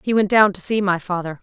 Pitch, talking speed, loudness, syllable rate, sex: 195 Hz, 295 wpm, -18 LUFS, 6.1 syllables/s, female